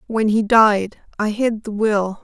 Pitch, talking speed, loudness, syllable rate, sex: 215 Hz, 160 wpm, -18 LUFS, 3.6 syllables/s, female